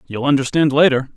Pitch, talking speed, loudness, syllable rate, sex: 140 Hz, 155 wpm, -16 LUFS, 6.3 syllables/s, male